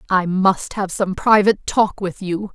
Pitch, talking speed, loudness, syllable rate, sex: 190 Hz, 190 wpm, -18 LUFS, 4.3 syllables/s, female